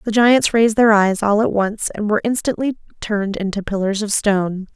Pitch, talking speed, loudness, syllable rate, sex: 210 Hz, 200 wpm, -17 LUFS, 5.5 syllables/s, female